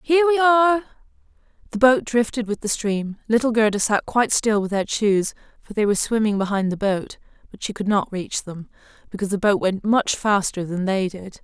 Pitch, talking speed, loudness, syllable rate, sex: 220 Hz, 200 wpm, -21 LUFS, 5.4 syllables/s, female